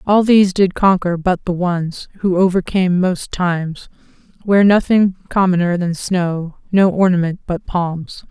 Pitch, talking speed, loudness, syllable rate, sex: 180 Hz, 145 wpm, -16 LUFS, 4.3 syllables/s, female